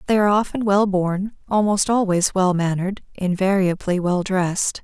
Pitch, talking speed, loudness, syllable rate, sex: 190 Hz, 150 wpm, -20 LUFS, 5.0 syllables/s, female